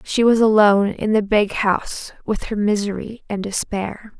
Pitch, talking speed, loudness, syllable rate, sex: 205 Hz, 170 wpm, -19 LUFS, 4.6 syllables/s, female